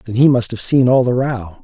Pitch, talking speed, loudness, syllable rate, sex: 120 Hz, 295 wpm, -15 LUFS, 5.4 syllables/s, male